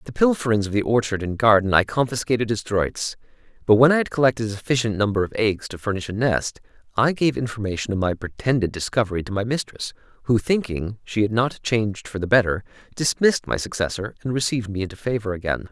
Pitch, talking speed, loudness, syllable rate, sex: 115 Hz, 200 wpm, -22 LUFS, 6.3 syllables/s, male